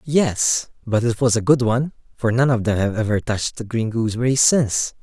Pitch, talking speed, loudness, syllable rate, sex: 120 Hz, 215 wpm, -19 LUFS, 5.6 syllables/s, male